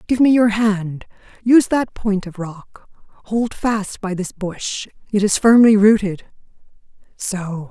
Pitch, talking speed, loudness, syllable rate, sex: 205 Hz, 125 wpm, -17 LUFS, 3.9 syllables/s, female